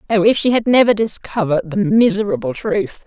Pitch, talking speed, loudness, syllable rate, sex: 210 Hz, 175 wpm, -16 LUFS, 5.6 syllables/s, female